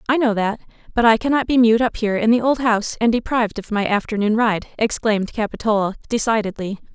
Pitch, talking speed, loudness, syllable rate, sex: 220 Hz, 200 wpm, -19 LUFS, 6.5 syllables/s, female